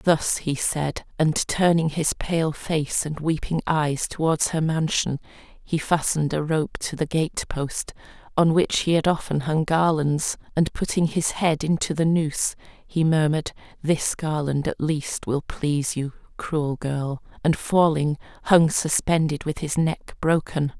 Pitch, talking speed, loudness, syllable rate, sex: 155 Hz, 155 wpm, -23 LUFS, 4.1 syllables/s, female